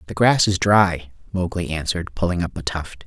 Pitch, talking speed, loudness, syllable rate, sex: 90 Hz, 195 wpm, -20 LUFS, 5.2 syllables/s, male